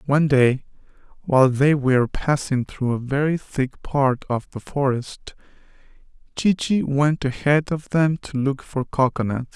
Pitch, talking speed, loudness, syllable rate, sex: 140 Hz, 150 wpm, -21 LUFS, 4.3 syllables/s, male